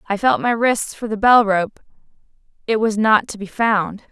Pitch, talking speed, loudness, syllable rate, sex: 215 Hz, 205 wpm, -17 LUFS, 4.6 syllables/s, female